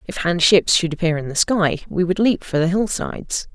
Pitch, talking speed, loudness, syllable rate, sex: 175 Hz, 235 wpm, -19 LUFS, 5.2 syllables/s, female